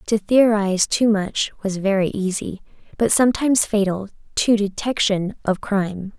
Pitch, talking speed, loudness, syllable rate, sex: 205 Hz, 135 wpm, -20 LUFS, 4.8 syllables/s, female